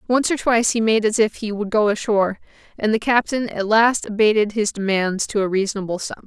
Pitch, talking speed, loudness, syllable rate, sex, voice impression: 215 Hz, 220 wpm, -19 LUFS, 5.9 syllables/s, female, feminine, slightly gender-neutral, slightly young, slightly adult-like, thin, tensed, slightly powerful, very bright, slightly hard, very clear, fluent, cute, slightly cool, intellectual, very refreshing, slightly sincere, friendly, reassuring, slightly unique, very wild, lively, kind